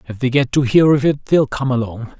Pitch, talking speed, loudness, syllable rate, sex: 130 Hz, 275 wpm, -16 LUFS, 5.5 syllables/s, male